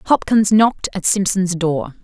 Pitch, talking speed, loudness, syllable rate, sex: 190 Hz, 150 wpm, -16 LUFS, 4.6 syllables/s, female